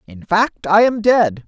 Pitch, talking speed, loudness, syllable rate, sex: 195 Hz, 205 wpm, -15 LUFS, 3.8 syllables/s, male